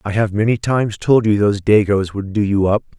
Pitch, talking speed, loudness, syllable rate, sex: 105 Hz, 240 wpm, -16 LUFS, 5.8 syllables/s, male